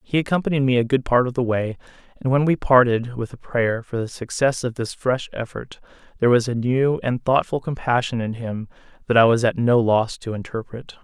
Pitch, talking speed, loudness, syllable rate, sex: 125 Hz, 215 wpm, -21 LUFS, 5.4 syllables/s, male